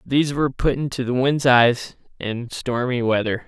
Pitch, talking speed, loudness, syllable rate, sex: 125 Hz, 175 wpm, -20 LUFS, 4.8 syllables/s, male